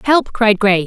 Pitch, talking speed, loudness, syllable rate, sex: 220 Hz, 205 wpm, -14 LUFS, 5.6 syllables/s, female